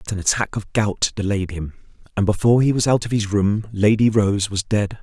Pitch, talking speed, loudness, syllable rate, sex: 105 Hz, 225 wpm, -19 LUFS, 5.4 syllables/s, male